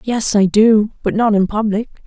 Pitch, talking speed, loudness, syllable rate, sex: 215 Hz, 205 wpm, -15 LUFS, 4.7 syllables/s, female